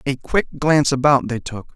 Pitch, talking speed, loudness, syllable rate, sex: 135 Hz, 205 wpm, -18 LUFS, 5.3 syllables/s, male